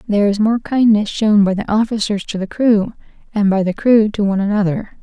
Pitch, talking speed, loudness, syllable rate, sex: 210 Hz, 215 wpm, -16 LUFS, 5.7 syllables/s, female